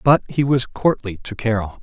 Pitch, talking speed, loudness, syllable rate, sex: 120 Hz, 200 wpm, -20 LUFS, 4.9 syllables/s, male